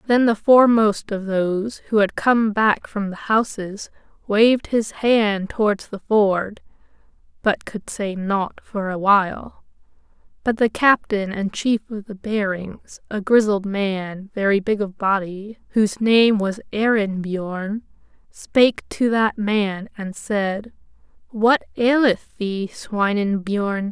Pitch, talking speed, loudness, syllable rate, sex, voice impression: 210 Hz, 140 wpm, -20 LUFS, 3.7 syllables/s, female, very feminine, slightly young, slightly dark, slightly cute, slightly refreshing, slightly calm